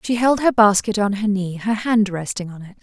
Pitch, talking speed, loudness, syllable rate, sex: 210 Hz, 255 wpm, -19 LUFS, 5.2 syllables/s, female